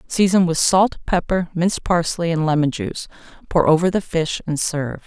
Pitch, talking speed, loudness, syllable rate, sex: 170 Hz, 180 wpm, -19 LUFS, 5.4 syllables/s, female